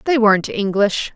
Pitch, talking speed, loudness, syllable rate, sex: 215 Hz, 155 wpm, -17 LUFS, 5.0 syllables/s, female